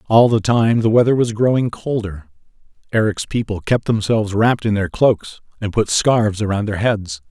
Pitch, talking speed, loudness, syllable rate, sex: 110 Hz, 180 wpm, -17 LUFS, 5.0 syllables/s, male